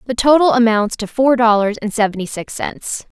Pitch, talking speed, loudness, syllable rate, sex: 230 Hz, 190 wpm, -16 LUFS, 5.1 syllables/s, female